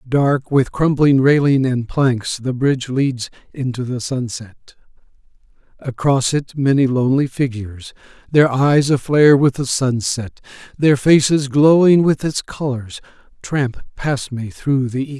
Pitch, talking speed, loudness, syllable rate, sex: 135 Hz, 140 wpm, -17 LUFS, 4.3 syllables/s, male